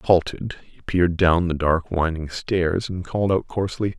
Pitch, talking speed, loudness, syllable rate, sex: 85 Hz, 180 wpm, -22 LUFS, 4.8 syllables/s, male